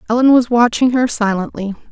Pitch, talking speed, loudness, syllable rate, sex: 230 Hz, 155 wpm, -14 LUFS, 5.7 syllables/s, female